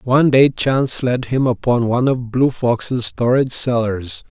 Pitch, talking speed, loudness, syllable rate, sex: 125 Hz, 165 wpm, -17 LUFS, 4.6 syllables/s, male